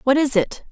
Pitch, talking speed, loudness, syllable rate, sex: 260 Hz, 250 wpm, -19 LUFS, 5.4 syllables/s, female